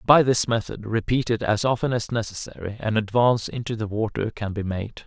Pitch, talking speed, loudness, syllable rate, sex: 110 Hz, 190 wpm, -24 LUFS, 5.5 syllables/s, male